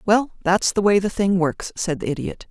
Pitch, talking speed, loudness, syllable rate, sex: 190 Hz, 240 wpm, -21 LUFS, 4.9 syllables/s, female